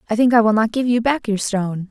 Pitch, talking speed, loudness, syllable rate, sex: 225 Hz, 315 wpm, -18 LUFS, 6.4 syllables/s, female